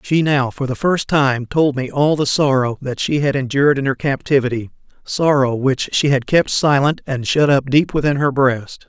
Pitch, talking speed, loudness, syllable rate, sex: 135 Hz, 205 wpm, -17 LUFS, 4.8 syllables/s, male